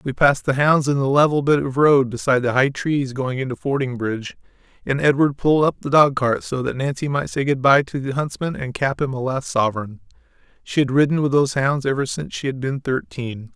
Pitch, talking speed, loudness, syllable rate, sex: 135 Hz, 230 wpm, -20 LUFS, 5.8 syllables/s, male